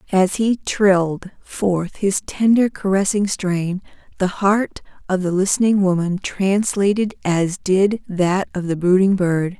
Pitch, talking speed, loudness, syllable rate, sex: 190 Hz, 140 wpm, -18 LUFS, 3.9 syllables/s, female